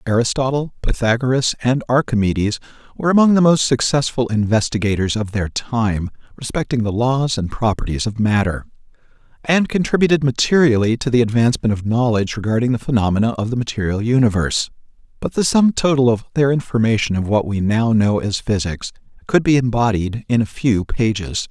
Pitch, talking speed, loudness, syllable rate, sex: 120 Hz, 155 wpm, -18 LUFS, 5.7 syllables/s, male